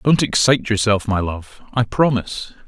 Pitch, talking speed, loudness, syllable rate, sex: 115 Hz, 155 wpm, -18 LUFS, 5.1 syllables/s, male